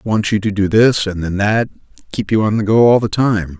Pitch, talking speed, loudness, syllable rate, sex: 105 Hz, 250 wpm, -15 LUFS, 5.1 syllables/s, male